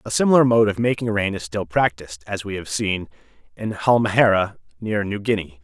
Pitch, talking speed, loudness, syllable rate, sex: 105 Hz, 190 wpm, -20 LUFS, 5.6 syllables/s, male